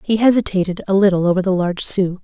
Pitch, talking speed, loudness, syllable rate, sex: 190 Hz, 215 wpm, -17 LUFS, 6.9 syllables/s, female